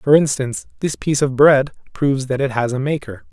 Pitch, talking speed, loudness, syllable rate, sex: 135 Hz, 215 wpm, -18 LUFS, 5.9 syllables/s, male